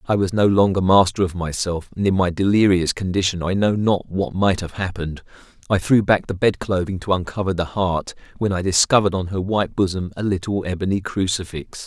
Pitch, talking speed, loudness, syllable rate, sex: 95 Hz, 195 wpm, -20 LUFS, 5.7 syllables/s, male